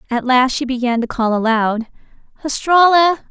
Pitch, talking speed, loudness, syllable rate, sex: 260 Hz, 145 wpm, -15 LUFS, 4.9 syllables/s, female